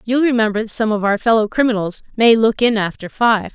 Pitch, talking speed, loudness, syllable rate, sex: 220 Hz, 220 wpm, -16 LUFS, 5.7 syllables/s, female